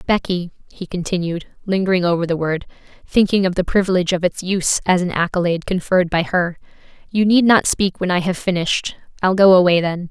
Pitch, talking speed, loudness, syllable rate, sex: 180 Hz, 190 wpm, -18 LUFS, 6.1 syllables/s, female